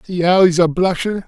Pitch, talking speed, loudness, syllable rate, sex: 180 Hz, 235 wpm, -15 LUFS, 5.3 syllables/s, male